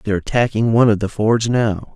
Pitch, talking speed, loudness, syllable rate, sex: 110 Hz, 215 wpm, -17 LUFS, 6.0 syllables/s, male